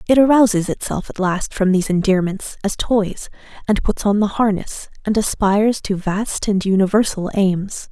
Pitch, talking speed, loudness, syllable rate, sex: 205 Hz, 165 wpm, -18 LUFS, 4.8 syllables/s, female